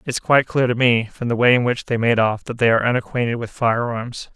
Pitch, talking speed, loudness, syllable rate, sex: 120 Hz, 275 wpm, -19 LUFS, 6.0 syllables/s, male